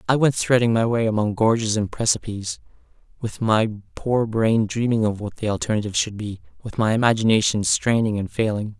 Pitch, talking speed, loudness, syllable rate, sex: 110 Hz, 175 wpm, -21 LUFS, 5.7 syllables/s, male